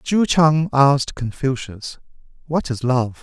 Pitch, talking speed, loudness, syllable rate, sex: 140 Hz, 130 wpm, -18 LUFS, 3.8 syllables/s, male